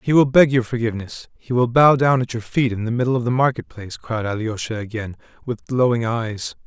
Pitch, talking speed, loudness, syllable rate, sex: 120 Hz, 225 wpm, -20 LUFS, 5.7 syllables/s, male